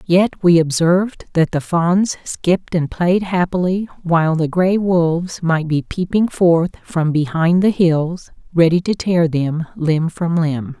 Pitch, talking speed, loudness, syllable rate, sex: 170 Hz, 160 wpm, -17 LUFS, 3.9 syllables/s, female